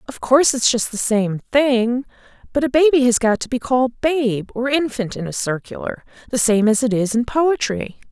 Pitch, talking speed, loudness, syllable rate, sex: 245 Hz, 205 wpm, -18 LUFS, 5.0 syllables/s, female